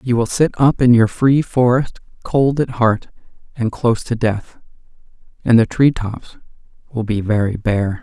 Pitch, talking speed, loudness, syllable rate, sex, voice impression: 120 Hz, 170 wpm, -16 LUFS, 4.4 syllables/s, male, masculine, slightly adult-like, slightly weak, slightly sincere, slightly calm, kind, slightly modest